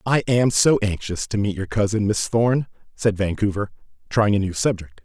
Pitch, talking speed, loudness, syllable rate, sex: 105 Hz, 190 wpm, -21 LUFS, 5.0 syllables/s, male